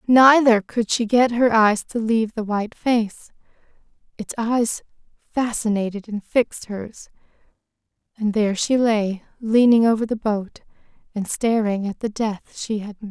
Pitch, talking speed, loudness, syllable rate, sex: 220 Hz, 150 wpm, -20 LUFS, 4.5 syllables/s, female